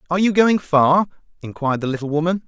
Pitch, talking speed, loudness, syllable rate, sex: 165 Hz, 195 wpm, -18 LUFS, 6.8 syllables/s, male